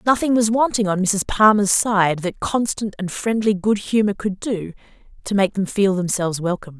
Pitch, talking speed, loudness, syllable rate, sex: 200 Hz, 185 wpm, -19 LUFS, 5.1 syllables/s, female